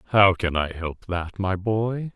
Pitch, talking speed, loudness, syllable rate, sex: 100 Hz, 195 wpm, -24 LUFS, 3.7 syllables/s, male